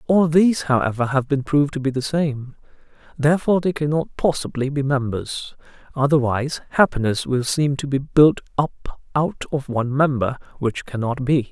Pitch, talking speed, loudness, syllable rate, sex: 140 Hz, 160 wpm, -20 LUFS, 5.2 syllables/s, male